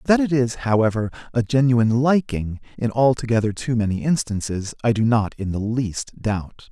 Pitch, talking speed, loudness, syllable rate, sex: 115 Hz, 170 wpm, -21 LUFS, 5.0 syllables/s, male